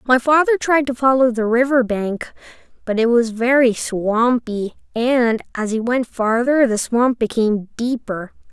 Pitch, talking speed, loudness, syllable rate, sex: 240 Hz, 155 wpm, -18 LUFS, 4.3 syllables/s, female